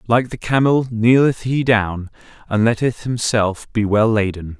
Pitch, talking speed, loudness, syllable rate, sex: 115 Hz, 155 wpm, -17 LUFS, 4.2 syllables/s, male